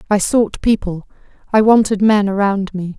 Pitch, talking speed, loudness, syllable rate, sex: 200 Hz, 140 wpm, -15 LUFS, 4.7 syllables/s, female